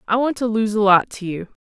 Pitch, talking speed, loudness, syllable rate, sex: 215 Hz, 295 wpm, -19 LUFS, 6.0 syllables/s, female